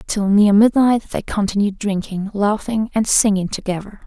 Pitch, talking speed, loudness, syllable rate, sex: 205 Hz, 150 wpm, -17 LUFS, 4.7 syllables/s, female